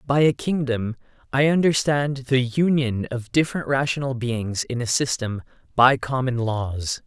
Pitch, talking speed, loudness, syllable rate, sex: 130 Hz, 145 wpm, -22 LUFS, 4.4 syllables/s, male